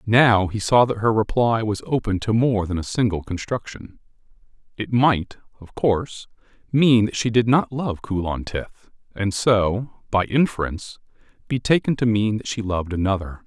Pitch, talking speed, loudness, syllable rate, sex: 110 Hz, 170 wpm, -21 LUFS, 4.7 syllables/s, male